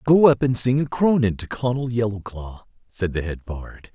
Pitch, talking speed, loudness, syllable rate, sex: 115 Hz, 200 wpm, -21 LUFS, 4.9 syllables/s, male